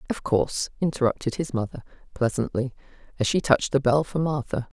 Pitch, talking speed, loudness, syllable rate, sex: 135 Hz, 165 wpm, -25 LUFS, 6.0 syllables/s, female